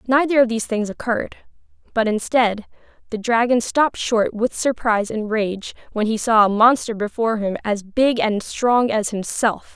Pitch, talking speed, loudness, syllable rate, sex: 225 Hz, 170 wpm, -19 LUFS, 4.9 syllables/s, female